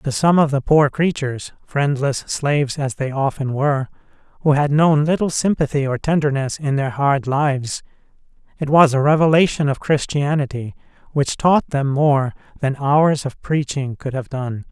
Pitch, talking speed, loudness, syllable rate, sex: 140 Hz, 165 wpm, -18 LUFS, 4.7 syllables/s, male